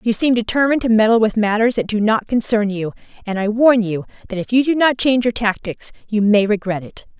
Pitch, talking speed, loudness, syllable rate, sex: 220 Hz, 235 wpm, -17 LUFS, 5.9 syllables/s, female